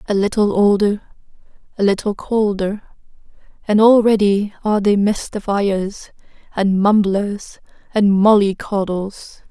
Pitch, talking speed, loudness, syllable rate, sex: 205 Hz, 95 wpm, -17 LUFS, 5.0 syllables/s, female